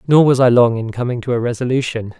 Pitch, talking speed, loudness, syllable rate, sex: 125 Hz, 245 wpm, -16 LUFS, 6.4 syllables/s, male